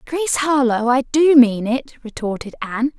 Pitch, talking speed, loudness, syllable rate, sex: 255 Hz, 160 wpm, -17 LUFS, 5.3 syllables/s, female